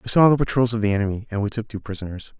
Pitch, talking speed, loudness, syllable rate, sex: 110 Hz, 300 wpm, -22 LUFS, 8.4 syllables/s, male